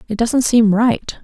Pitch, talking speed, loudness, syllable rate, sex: 225 Hz, 195 wpm, -15 LUFS, 3.9 syllables/s, female